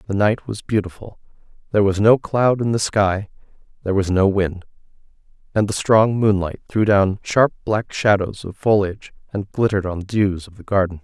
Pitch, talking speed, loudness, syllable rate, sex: 100 Hz, 185 wpm, -19 LUFS, 5.3 syllables/s, male